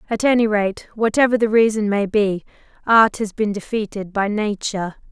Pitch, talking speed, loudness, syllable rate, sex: 210 Hz, 165 wpm, -19 LUFS, 5.1 syllables/s, female